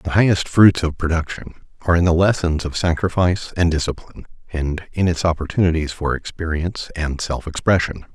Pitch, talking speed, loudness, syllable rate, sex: 85 Hz, 160 wpm, -19 LUFS, 5.7 syllables/s, male